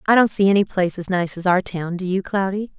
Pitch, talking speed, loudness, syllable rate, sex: 190 Hz, 280 wpm, -20 LUFS, 6.1 syllables/s, female